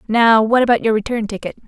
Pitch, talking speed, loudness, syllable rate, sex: 225 Hz, 215 wpm, -15 LUFS, 6.4 syllables/s, female